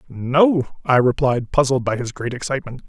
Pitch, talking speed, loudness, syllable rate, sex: 130 Hz, 165 wpm, -19 LUFS, 5.2 syllables/s, male